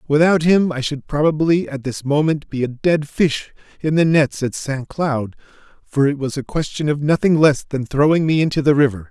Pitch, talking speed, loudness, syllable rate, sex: 145 Hz, 210 wpm, -18 LUFS, 5.1 syllables/s, male